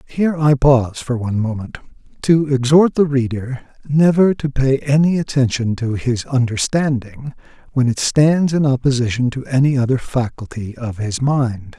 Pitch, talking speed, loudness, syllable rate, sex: 130 Hz, 155 wpm, -17 LUFS, 4.7 syllables/s, male